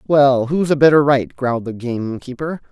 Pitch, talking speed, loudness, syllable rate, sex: 135 Hz, 175 wpm, -17 LUFS, 5.1 syllables/s, male